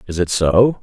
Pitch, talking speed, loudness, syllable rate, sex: 95 Hz, 220 wpm, -16 LUFS, 4.6 syllables/s, male